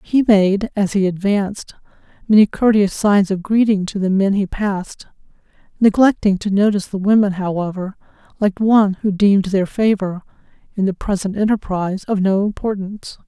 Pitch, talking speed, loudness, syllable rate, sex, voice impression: 200 Hz, 155 wpm, -17 LUFS, 5.3 syllables/s, female, very feminine, thin, slightly tensed, slightly weak, dark, soft, muffled, fluent, slightly raspy, slightly cute, intellectual, slightly refreshing, very sincere, very calm, very friendly, very reassuring, unique, very elegant, slightly wild, sweet, very kind, modest